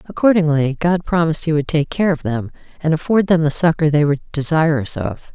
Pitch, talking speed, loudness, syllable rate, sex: 155 Hz, 200 wpm, -17 LUFS, 5.7 syllables/s, female